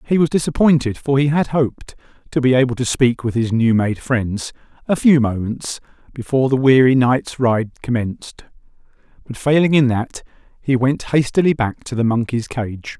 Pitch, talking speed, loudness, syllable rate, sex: 130 Hz, 175 wpm, -17 LUFS, 5.1 syllables/s, male